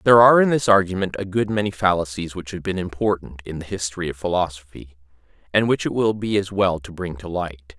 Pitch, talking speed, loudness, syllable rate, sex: 95 Hz, 225 wpm, -21 LUFS, 6.1 syllables/s, male